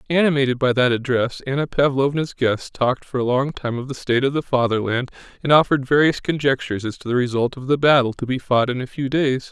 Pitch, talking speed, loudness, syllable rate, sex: 130 Hz, 225 wpm, -20 LUFS, 6.1 syllables/s, male